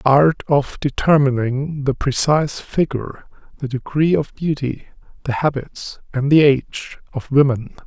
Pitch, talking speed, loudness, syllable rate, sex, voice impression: 140 Hz, 130 wpm, -18 LUFS, 4.5 syllables/s, male, very masculine, old, slightly thick, muffled, calm, friendly, slightly wild